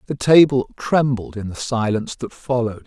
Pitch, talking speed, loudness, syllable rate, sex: 120 Hz, 165 wpm, -19 LUFS, 5.4 syllables/s, male